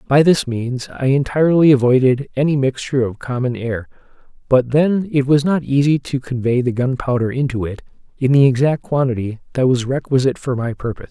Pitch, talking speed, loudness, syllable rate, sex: 130 Hz, 180 wpm, -17 LUFS, 5.6 syllables/s, male